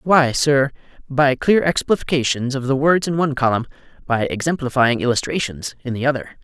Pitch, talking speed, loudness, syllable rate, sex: 135 Hz, 160 wpm, -19 LUFS, 5.4 syllables/s, male